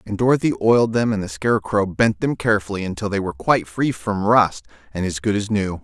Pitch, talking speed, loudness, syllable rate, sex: 100 Hz, 225 wpm, -20 LUFS, 6.2 syllables/s, male